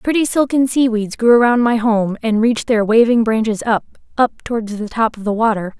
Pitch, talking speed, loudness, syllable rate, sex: 225 Hz, 215 wpm, -16 LUFS, 5.4 syllables/s, female